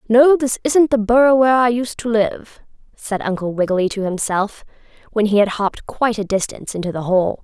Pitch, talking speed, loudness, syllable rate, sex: 220 Hz, 200 wpm, -17 LUFS, 5.6 syllables/s, female